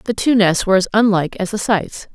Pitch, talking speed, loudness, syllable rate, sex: 200 Hz, 250 wpm, -16 LUFS, 6.4 syllables/s, female